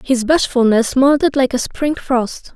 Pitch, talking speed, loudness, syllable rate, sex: 260 Hz, 165 wpm, -15 LUFS, 4.1 syllables/s, female